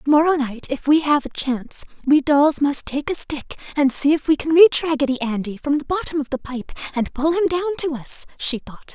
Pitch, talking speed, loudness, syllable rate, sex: 290 Hz, 235 wpm, -20 LUFS, 5.3 syllables/s, female